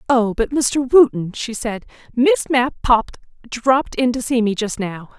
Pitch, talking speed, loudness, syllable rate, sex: 245 Hz, 175 wpm, -18 LUFS, 4.5 syllables/s, female